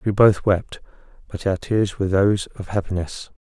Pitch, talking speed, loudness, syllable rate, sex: 100 Hz, 175 wpm, -21 LUFS, 5.2 syllables/s, male